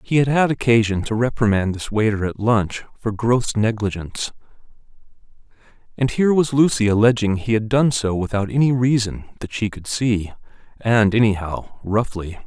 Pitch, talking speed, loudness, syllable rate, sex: 110 Hz, 155 wpm, -19 LUFS, 5.1 syllables/s, male